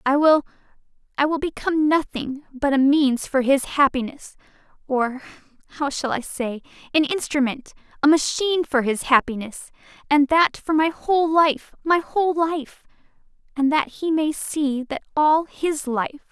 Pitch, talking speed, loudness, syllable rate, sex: 290 Hz, 145 wpm, -21 LUFS, 4.5 syllables/s, female